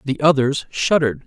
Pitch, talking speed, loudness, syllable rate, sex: 140 Hz, 140 wpm, -18 LUFS, 5.3 syllables/s, male